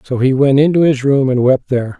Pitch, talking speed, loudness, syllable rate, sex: 135 Hz, 270 wpm, -13 LUFS, 5.8 syllables/s, male